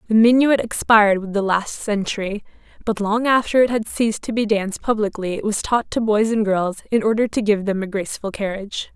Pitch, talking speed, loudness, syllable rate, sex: 210 Hz, 215 wpm, -19 LUFS, 5.8 syllables/s, female